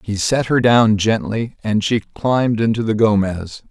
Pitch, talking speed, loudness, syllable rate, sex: 110 Hz, 180 wpm, -17 LUFS, 4.5 syllables/s, male